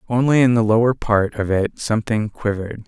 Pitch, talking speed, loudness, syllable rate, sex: 110 Hz, 190 wpm, -18 LUFS, 5.6 syllables/s, male